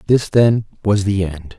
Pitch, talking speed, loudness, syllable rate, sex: 100 Hz, 190 wpm, -17 LUFS, 4.1 syllables/s, male